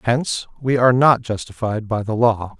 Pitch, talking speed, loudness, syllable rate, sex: 115 Hz, 185 wpm, -18 LUFS, 5.2 syllables/s, male